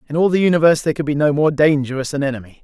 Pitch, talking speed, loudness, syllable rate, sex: 150 Hz, 275 wpm, -17 LUFS, 8.2 syllables/s, male